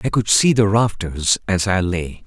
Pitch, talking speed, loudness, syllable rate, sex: 100 Hz, 210 wpm, -18 LUFS, 4.3 syllables/s, male